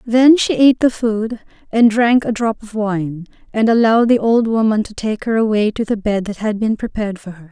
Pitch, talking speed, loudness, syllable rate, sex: 220 Hz, 230 wpm, -16 LUFS, 5.1 syllables/s, female